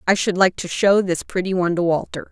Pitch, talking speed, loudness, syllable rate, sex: 180 Hz, 260 wpm, -19 LUFS, 6.1 syllables/s, female